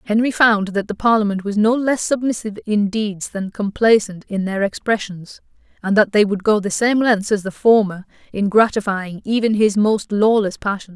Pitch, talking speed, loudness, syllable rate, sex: 210 Hz, 185 wpm, -18 LUFS, 5.0 syllables/s, female